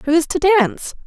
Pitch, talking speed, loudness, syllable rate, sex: 325 Hz, 225 wpm, -16 LUFS, 6.1 syllables/s, female